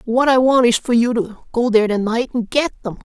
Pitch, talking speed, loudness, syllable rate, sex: 235 Hz, 270 wpm, -17 LUFS, 5.9 syllables/s, male